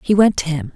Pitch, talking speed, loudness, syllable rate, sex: 175 Hz, 320 wpm, -17 LUFS, 6.2 syllables/s, female